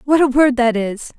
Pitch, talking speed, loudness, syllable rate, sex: 255 Hz, 255 wpm, -15 LUFS, 4.8 syllables/s, female